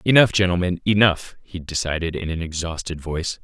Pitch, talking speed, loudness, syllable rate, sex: 90 Hz, 155 wpm, -21 LUFS, 5.6 syllables/s, male